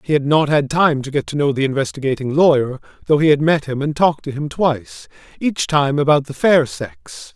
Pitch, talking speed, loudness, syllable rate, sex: 140 Hz, 230 wpm, -17 LUFS, 5.4 syllables/s, male